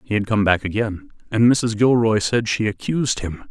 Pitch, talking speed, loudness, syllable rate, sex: 110 Hz, 205 wpm, -19 LUFS, 5.1 syllables/s, male